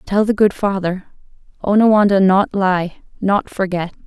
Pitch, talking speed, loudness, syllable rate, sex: 195 Hz, 135 wpm, -16 LUFS, 4.5 syllables/s, female